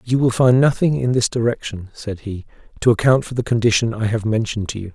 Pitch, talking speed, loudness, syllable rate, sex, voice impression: 115 Hz, 230 wpm, -18 LUFS, 6.0 syllables/s, male, very masculine, very middle-aged, very thick, slightly relaxed, slightly weak, dark, soft, muffled, fluent, slightly raspy, cool, very intellectual, refreshing, very sincere, very calm, very mature, very friendly, very reassuring, unique, elegant, wild, sweet, lively, kind, modest